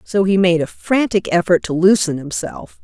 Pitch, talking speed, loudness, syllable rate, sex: 185 Hz, 190 wpm, -16 LUFS, 4.8 syllables/s, female